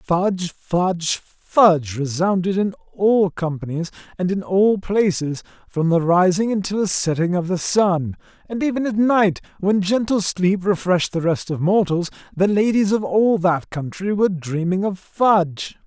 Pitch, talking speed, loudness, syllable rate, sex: 185 Hz, 160 wpm, -19 LUFS, 4.4 syllables/s, male